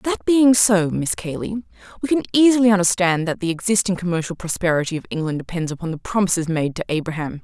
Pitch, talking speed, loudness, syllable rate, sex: 185 Hz, 185 wpm, -19 LUFS, 6.1 syllables/s, female